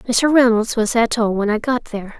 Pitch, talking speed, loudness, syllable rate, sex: 230 Hz, 245 wpm, -17 LUFS, 5.1 syllables/s, female